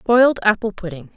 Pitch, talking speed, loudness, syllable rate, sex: 210 Hz, 155 wpm, -17 LUFS, 5.8 syllables/s, female